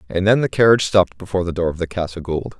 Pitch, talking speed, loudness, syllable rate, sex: 90 Hz, 275 wpm, -18 LUFS, 7.5 syllables/s, male